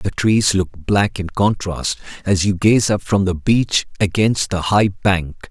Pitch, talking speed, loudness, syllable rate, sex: 95 Hz, 185 wpm, -17 LUFS, 3.8 syllables/s, male